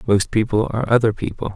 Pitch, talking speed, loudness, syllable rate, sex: 110 Hz, 195 wpm, -19 LUFS, 6.4 syllables/s, male